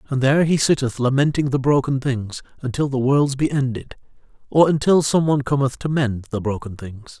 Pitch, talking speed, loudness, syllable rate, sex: 135 Hz, 185 wpm, -19 LUFS, 5.5 syllables/s, male